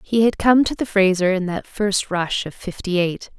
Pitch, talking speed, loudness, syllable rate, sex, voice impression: 195 Hz, 230 wpm, -19 LUFS, 4.6 syllables/s, female, feminine, adult-like, slightly refreshing, slightly calm, friendly, slightly reassuring